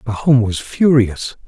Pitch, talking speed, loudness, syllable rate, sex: 120 Hz, 120 wpm, -15 LUFS, 3.9 syllables/s, male